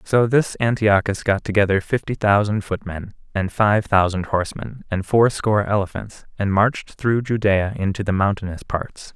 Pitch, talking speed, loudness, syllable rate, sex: 105 Hz, 150 wpm, -20 LUFS, 4.9 syllables/s, male